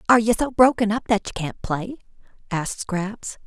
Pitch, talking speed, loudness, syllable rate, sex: 210 Hz, 190 wpm, -22 LUFS, 5.5 syllables/s, female